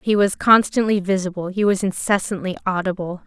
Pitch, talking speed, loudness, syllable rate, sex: 195 Hz, 145 wpm, -19 LUFS, 5.5 syllables/s, female